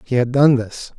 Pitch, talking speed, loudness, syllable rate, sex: 125 Hz, 245 wpm, -16 LUFS, 4.7 syllables/s, male